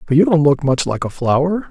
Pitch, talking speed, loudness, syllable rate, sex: 150 Hz, 280 wpm, -16 LUFS, 5.8 syllables/s, male